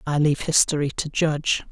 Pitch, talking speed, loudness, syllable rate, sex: 150 Hz, 175 wpm, -21 LUFS, 5.7 syllables/s, male